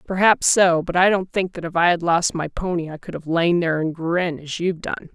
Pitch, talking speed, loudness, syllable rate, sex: 170 Hz, 270 wpm, -20 LUFS, 5.8 syllables/s, female